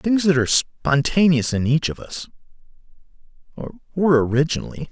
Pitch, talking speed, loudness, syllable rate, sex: 150 Hz, 120 wpm, -19 LUFS, 5.7 syllables/s, male